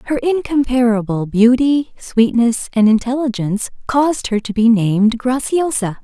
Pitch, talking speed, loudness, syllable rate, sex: 240 Hz, 120 wpm, -16 LUFS, 4.7 syllables/s, female